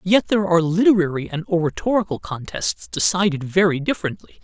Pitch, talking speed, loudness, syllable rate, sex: 170 Hz, 135 wpm, -20 LUFS, 6.0 syllables/s, male